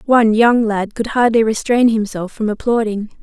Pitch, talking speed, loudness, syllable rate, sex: 220 Hz, 165 wpm, -15 LUFS, 5.0 syllables/s, female